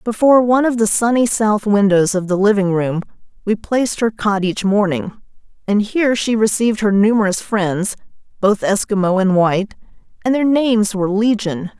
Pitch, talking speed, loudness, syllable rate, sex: 210 Hz, 170 wpm, -16 LUFS, 5.3 syllables/s, female